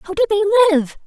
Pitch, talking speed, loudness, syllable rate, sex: 390 Hz, 225 wpm, -15 LUFS, 8.3 syllables/s, female